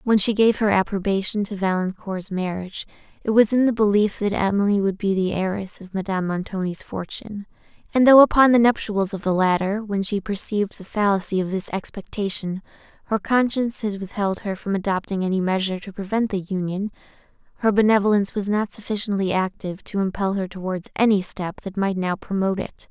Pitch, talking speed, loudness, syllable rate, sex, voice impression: 200 Hz, 180 wpm, -22 LUFS, 5.8 syllables/s, female, very feminine, slightly young, slightly adult-like, very thin, slightly tensed, slightly weak, slightly bright, soft, clear, fluent, very cute, intellectual, very refreshing, very sincere, very calm, very friendly, reassuring, very unique, elegant, slightly wild, kind, slightly modest